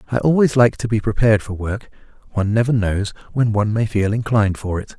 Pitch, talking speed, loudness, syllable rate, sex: 110 Hz, 215 wpm, -18 LUFS, 6.3 syllables/s, male